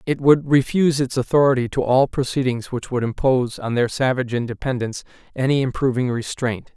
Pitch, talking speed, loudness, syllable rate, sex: 130 Hz, 160 wpm, -20 LUFS, 5.9 syllables/s, male